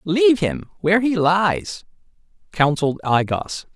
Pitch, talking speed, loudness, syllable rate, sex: 170 Hz, 130 wpm, -19 LUFS, 4.3 syllables/s, male